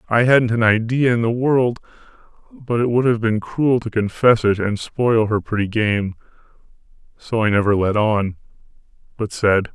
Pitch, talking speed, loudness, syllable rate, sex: 115 Hz, 170 wpm, -18 LUFS, 4.6 syllables/s, male